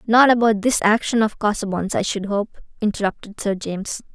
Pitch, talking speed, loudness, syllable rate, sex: 210 Hz, 175 wpm, -20 LUFS, 5.4 syllables/s, female